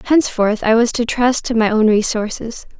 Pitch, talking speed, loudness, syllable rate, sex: 230 Hz, 195 wpm, -16 LUFS, 5.2 syllables/s, female